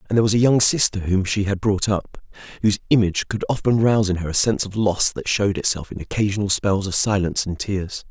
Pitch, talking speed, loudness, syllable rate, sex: 100 Hz, 235 wpm, -20 LUFS, 6.4 syllables/s, male